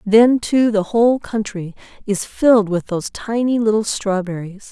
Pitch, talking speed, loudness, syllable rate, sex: 215 Hz, 155 wpm, -17 LUFS, 4.7 syllables/s, female